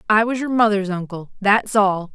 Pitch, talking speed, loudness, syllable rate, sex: 205 Hz, 195 wpm, -18 LUFS, 4.8 syllables/s, female